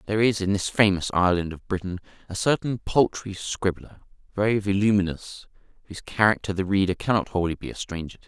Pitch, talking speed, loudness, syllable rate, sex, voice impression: 100 Hz, 175 wpm, -24 LUFS, 5.9 syllables/s, male, very masculine, middle-aged, slightly thick, very tensed, powerful, bright, slightly dark, slightly soft, slightly muffled, fluent, cool, intellectual, refreshing, very sincere, very calm, mature, friendly, reassuring, slightly unique, elegant, wild, sweet, slightly lively, strict, slightly intense